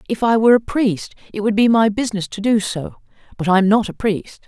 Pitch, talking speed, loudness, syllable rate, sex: 215 Hz, 255 wpm, -17 LUFS, 5.9 syllables/s, female